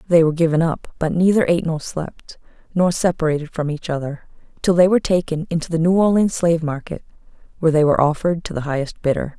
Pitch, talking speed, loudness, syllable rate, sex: 165 Hz, 205 wpm, -19 LUFS, 6.6 syllables/s, female